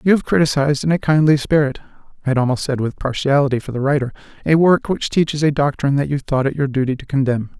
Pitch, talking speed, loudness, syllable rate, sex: 140 Hz, 220 wpm, -18 LUFS, 6.8 syllables/s, male